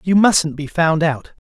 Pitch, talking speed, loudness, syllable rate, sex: 165 Hz, 205 wpm, -16 LUFS, 3.9 syllables/s, male